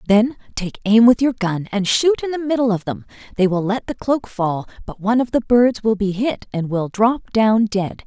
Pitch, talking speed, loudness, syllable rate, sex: 220 Hz, 240 wpm, -18 LUFS, 4.9 syllables/s, female